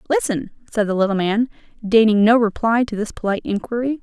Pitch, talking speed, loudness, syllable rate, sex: 225 Hz, 180 wpm, -19 LUFS, 6.1 syllables/s, female